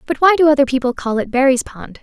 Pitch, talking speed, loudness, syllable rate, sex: 270 Hz, 265 wpm, -15 LUFS, 6.5 syllables/s, female